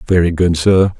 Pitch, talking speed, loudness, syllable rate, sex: 90 Hz, 180 wpm, -13 LUFS, 5.1 syllables/s, male